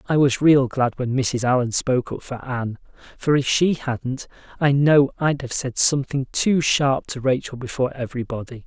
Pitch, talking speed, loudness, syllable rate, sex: 130 Hz, 185 wpm, -21 LUFS, 5.1 syllables/s, male